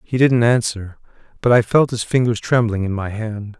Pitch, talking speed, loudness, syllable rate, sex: 115 Hz, 200 wpm, -18 LUFS, 4.9 syllables/s, male